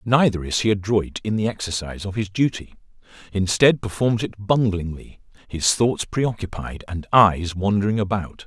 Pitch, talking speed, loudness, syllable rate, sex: 100 Hz, 150 wpm, -21 LUFS, 4.8 syllables/s, male